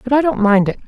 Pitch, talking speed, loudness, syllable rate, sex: 240 Hz, 340 wpm, -15 LUFS, 6.6 syllables/s, female